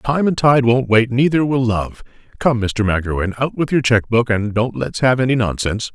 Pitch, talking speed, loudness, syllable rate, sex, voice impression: 120 Hz, 230 wpm, -17 LUFS, 5.3 syllables/s, male, masculine, middle-aged, thick, tensed, powerful, dark, clear, cool, intellectual, calm, mature, wild, strict